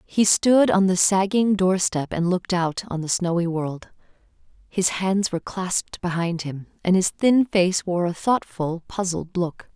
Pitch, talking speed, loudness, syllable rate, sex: 180 Hz, 170 wpm, -22 LUFS, 4.3 syllables/s, female